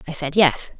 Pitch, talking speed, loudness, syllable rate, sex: 160 Hz, 225 wpm, -18 LUFS, 5.2 syllables/s, female